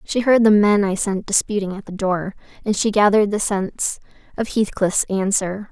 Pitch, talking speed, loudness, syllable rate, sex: 200 Hz, 190 wpm, -19 LUFS, 5.1 syllables/s, female